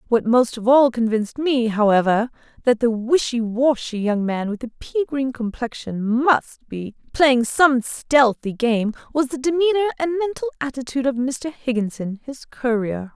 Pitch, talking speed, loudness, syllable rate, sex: 250 Hz, 160 wpm, -20 LUFS, 4.5 syllables/s, female